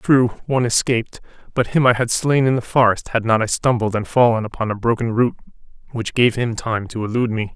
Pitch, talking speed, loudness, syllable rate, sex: 115 Hz, 220 wpm, -18 LUFS, 5.8 syllables/s, male